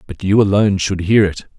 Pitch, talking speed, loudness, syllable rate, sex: 100 Hz, 225 wpm, -15 LUFS, 5.8 syllables/s, male